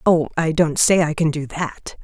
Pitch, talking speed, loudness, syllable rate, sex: 160 Hz, 235 wpm, -19 LUFS, 4.5 syllables/s, female